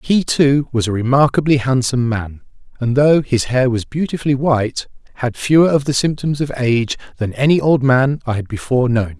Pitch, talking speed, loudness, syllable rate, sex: 130 Hz, 190 wpm, -16 LUFS, 5.5 syllables/s, male